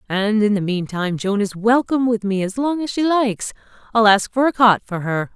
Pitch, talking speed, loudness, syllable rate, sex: 215 Hz, 245 wpm, -18 LUFS, 5.3 syllables/s, female